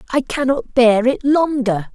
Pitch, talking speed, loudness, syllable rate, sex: 250 Hz, 155 wpm, -16 LUFS, 4.0 syllables/s, male